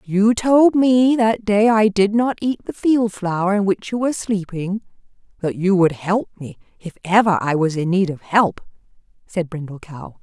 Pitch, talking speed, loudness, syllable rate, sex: 200 Hz, 195 wpm, -18 LUFS, 4.4 syllables/s, female